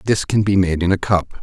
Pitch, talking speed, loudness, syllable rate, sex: 95 Hz, 295 wpm, -17 LUFS, 5.5 syllables/s, male